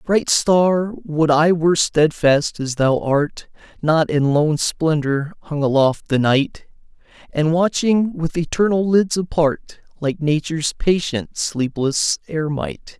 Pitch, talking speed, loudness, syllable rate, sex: 155 Hz, 130 wpm, -18 LUFS, 3.7 syllables/s, male